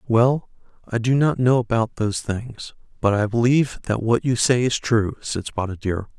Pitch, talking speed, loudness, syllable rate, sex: 115 Hz, 195 wpm, -21 LUFS, 4.8 syllables/s, male